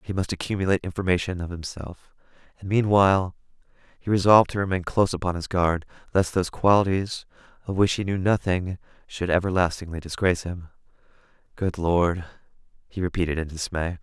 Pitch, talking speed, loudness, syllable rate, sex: 90 Hz, 145 wpm, -24 LUFS, 6.0 syllables/s, male